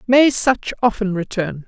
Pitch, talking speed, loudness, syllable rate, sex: 215 Hz, 145 wpm, -18 LUFS, 4.2 syllables/s, female